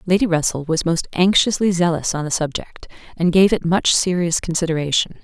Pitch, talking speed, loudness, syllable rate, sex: 170 Hz, 170 wpm, -18 LUFS, 5.5 syllables/s, female